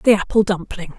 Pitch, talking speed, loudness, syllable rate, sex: 200 Hz, 185 wpm, -18 LUFS, 5.4 syllables/s, female